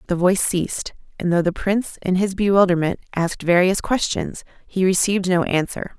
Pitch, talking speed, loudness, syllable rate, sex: 185 Hz, 170 wpm, -20 LUFS, 5.7 syllables/s, female